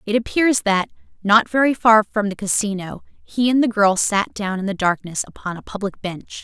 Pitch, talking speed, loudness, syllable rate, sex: 210 Hz, 205 wpm, -19 LUFS, 4.9 syllables/s, female